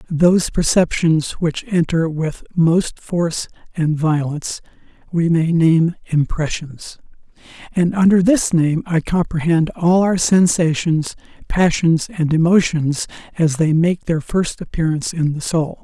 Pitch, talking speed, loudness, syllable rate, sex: 165 Hz, 130 wpm, -17 LUFS, 4.1 syllables/s, male